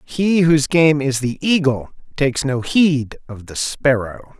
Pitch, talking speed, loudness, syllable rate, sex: 140 Hz, 165 wpm, -17 LUFS, 4.0 syllables/s, male